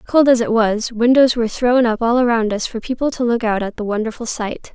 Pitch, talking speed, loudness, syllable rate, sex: 235 Hz, 255 wpm, -17 LUFS, 5.5 syllables/s, female